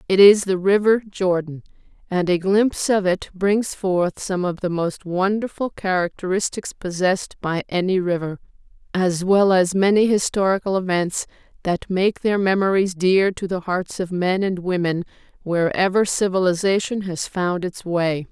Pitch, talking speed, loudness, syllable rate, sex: 185 Hz, 150 wpm, -20 LUFS, 4.6 syllables/s, female